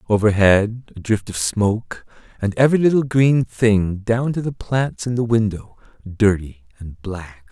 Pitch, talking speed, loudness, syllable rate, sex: 110 Hz, 160 wpm, -19 LUFS, 4.3 syllables/s, male